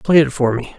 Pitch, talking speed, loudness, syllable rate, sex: 140 Hz, 305 wpm, -16 LUFS, 5.8 syllables/s, male